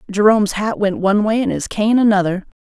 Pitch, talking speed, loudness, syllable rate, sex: 205 Hz, 205 wpm, -16 LUFS, 6.2 syllables/s, female